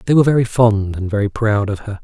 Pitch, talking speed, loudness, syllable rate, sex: 110 Hz, 265 wpm, -16 LUFS, 6.5 syllables/s, male